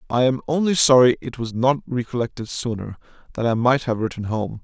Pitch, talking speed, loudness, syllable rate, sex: 125 Hz, 195 wpm, -20 LUFS, 5.7 syllables/s, male